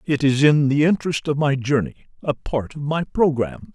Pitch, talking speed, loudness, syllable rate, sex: 140 Hz, 190 wpm, -20 LUFS, 5.4 syllables/s, male